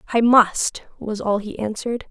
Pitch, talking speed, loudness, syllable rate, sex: 220 Hz, 170 wpm, -20 LUFS, 4.6 syllables/s, female